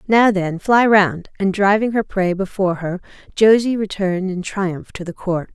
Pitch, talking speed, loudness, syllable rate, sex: 195 Hz, 185 wpm, -18 LUFS, 4.6 syllables/s, female